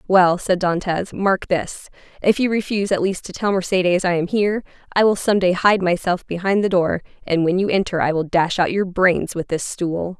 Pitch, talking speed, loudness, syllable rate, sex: 185 Hz, 225 wpm, -19 LUFS, 5.2 syllables/s, female